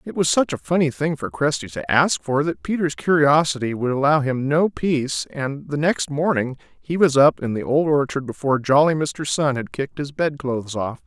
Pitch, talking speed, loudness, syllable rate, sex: 140 Hz, 210 wpm, -20 LUFS, 5.1 syllables/s, male